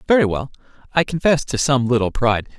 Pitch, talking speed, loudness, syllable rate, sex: 130 Hz, 185 wpm, -19 LUFS, 6.4 syllables/s, male